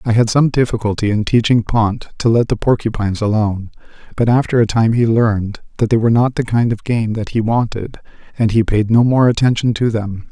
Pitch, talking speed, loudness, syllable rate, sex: 115 Hz, 215 wpm, -15 LUFS, 5.7 syllables/s, male